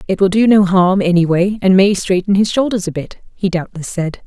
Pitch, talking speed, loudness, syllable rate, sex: 190 Hz, 225 wpm, -14 LUFS, 5.4 syllables/s, female